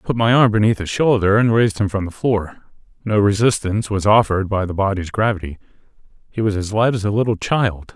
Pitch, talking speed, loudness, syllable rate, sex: 105 Hz, 210 wpm, -18 LUFS, 6.1 syllables/s, male